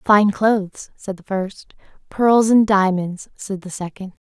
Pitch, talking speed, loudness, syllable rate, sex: 200 Hz, 155 wpm, -18 LUFS, 3.8 syllables/s, female